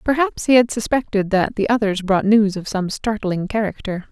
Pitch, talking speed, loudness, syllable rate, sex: 210 Hz, 190 wpm, -19 LUFS, 5.0 syllables/s, female